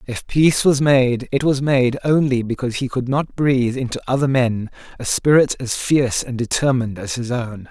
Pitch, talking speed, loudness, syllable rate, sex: 130 Hz, 195 wpm, -18 LUFS, 5.2 syllables/s, male